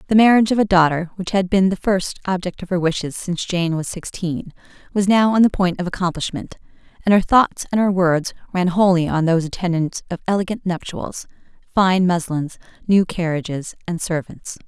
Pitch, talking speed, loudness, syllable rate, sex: 180 Hz, 185 wpm, -19 LUFS, 5.4 syllables/s, female